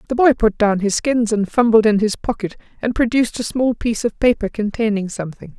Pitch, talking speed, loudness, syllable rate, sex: 220 Hz, 215 wpm, -18 LUFS, 5.8 syllables/s, female